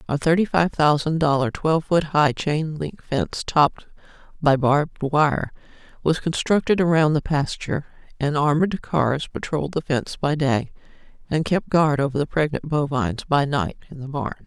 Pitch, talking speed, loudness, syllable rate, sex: 145 Hz, 165 wpm, -22 LUFS, 5.1 syllables/s, female